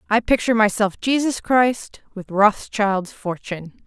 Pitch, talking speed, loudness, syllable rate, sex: 215 Hz, 125 wpm, -19 LUFS, 4.3 syllables/s, female